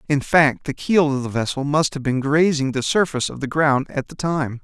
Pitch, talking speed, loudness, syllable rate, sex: 145 Hz, 245 wpm, -20 LUFS, 5.2 syllables/s, male